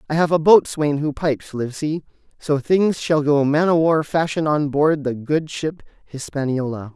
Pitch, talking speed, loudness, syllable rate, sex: 150 Hz, 175 wpm, -19 LUFS, 4.7 syllables/s, male